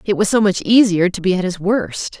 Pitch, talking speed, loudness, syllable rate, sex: 195 Hz, 275 wpm, -16 LUFS, 5.4 syllables/s, female